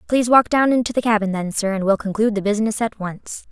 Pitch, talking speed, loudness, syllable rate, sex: 215 Hz, 255 wpm, -19 LUFS, 6.7 syllables/s, female